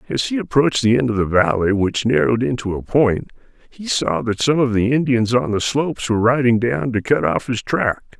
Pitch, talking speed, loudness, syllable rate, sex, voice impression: 120 Hz, 225 wpm, -18 LUFS, 5.5 syllables/s, male, very masculine, very adult-like, old, very thick, tensed, very powerful, slightly bright, very soft, muffled, raspy, very cool, intellectual, sincere, very calm, very mature, friendly, reassuring, very unique, elegant, very wild, sweet, lively, strict, slightly intense